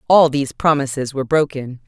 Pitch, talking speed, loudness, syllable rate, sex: 140 Hz, 160 wpm, -17 LUFS, 6.0 syllables/s, female